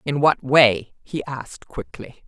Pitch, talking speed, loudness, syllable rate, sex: 135 Hz, 160 wpm, -19 LUFS, 3.9 syllables/s, female